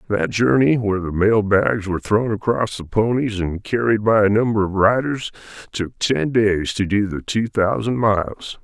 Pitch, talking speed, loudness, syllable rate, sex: 105 Hz, 190 wpm, -19 LUFS, 4.6 syllables/s, male